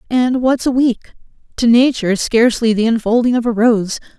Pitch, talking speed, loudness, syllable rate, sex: 235 Hz, 160 wpm, -14 LUFS, 5.5 syllables/s, female